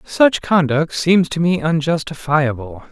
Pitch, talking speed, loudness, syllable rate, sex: 160 Hz, 125 wpm, -17 LUFS, 4.0 syllables/s, male